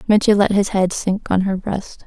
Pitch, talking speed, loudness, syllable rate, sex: 195 Hz, 235 wpm, -18 LUFS, 4.7 syllables/s, female